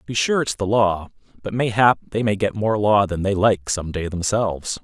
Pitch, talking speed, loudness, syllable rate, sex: 100 Hz, 235 wpm, -20 LUFS, 5.0 syllables/s, male